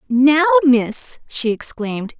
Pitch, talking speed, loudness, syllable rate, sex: 265 Hz, 110 wpm, -17 LUFS, 3.5 syllables/s, female